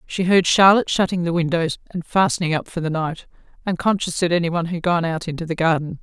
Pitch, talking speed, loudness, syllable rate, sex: 170 Hz, 220 wpm, -20 LUFS, 6.3 syllables/s, female